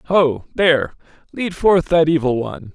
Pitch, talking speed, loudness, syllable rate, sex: 150 Hz, 155 wpm, -17 LUFS, 4.5 syllables/s, male